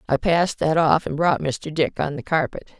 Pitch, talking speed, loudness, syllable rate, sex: 155 Hz, 235 wpm, -21 LUFS, 5.1 syllables/s, female